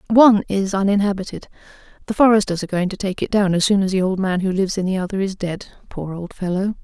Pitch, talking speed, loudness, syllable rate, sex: 195 Hz, 235 wpm, -19 LUFS, 6.6 syllables/s, female